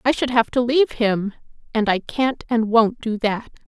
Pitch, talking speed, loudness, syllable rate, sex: 230 Hz, 210 wpm, -20 LUFS, 4.7 syllables/s, female